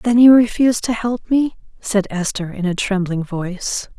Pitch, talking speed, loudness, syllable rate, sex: 210 Hz, 180 wpm, -17 LUFS, 4.6 syllables/s, female